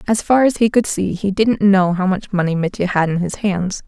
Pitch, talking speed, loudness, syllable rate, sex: 195 Hz, 265 wpm, -17 LUFS, 5.1 syllables/s, female